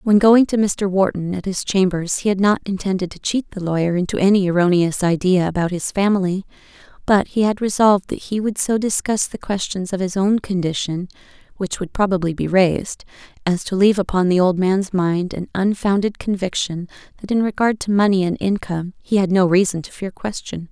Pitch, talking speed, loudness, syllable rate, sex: 190 Hz, 195 wpm, -19 LUFS, 5.5 syllables/s, female